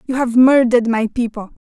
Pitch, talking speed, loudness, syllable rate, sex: 240 Hz, 175 wpm, -15 LUFS, 5.8 syllables/s, female